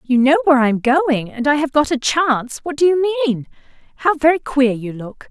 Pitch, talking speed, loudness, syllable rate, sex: 275 Hz, 225 wpm, -16 LUFS, 5.5 syllables/s, female